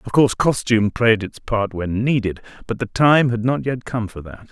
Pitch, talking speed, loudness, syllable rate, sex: 115 Hz, 225 wpm, -19 LUFS, 5.1 syllables/s, male